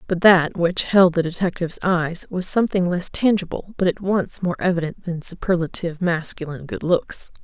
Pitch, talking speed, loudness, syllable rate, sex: 175 Hz, 170 wpm, -21 LUFS, 5.2 syllables/s, female